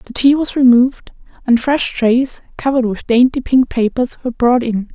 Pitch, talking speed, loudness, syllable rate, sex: 245 Hz, 180 wpm, -14 LUFS, 5.0 syllables/s, female